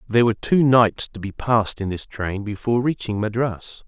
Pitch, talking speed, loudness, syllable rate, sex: 110 Hz, 200 wpm, -21 LUFS, 5.4 syllables/s, male